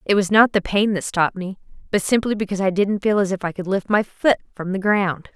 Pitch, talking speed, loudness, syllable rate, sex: 195 Hz, 270 wpm, -20 LUFS, 5.9 syllables/s, female